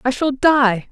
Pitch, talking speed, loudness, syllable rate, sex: 255 Hz, 195 wpm, -16 LUFS, 3.7 syllables/s, female